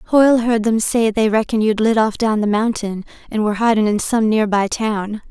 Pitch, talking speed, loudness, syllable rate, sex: 220 Hz, 225 wpm, -17 LUFS, 5.2 syllables/s, female